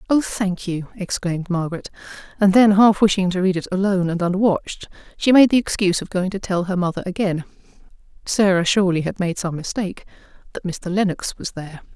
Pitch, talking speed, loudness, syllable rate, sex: 190 Hz, 185 wpm, -19 LUFS, 5.2 syllables/s, female